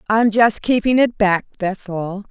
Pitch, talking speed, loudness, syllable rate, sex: 210 Hz, 180 wpm, -17 LUFS, 4.1 syllables/s, female